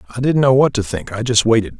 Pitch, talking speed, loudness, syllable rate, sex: 120 Hz, 300 wpm, -16 LUFS, 7.0 syllables/s, male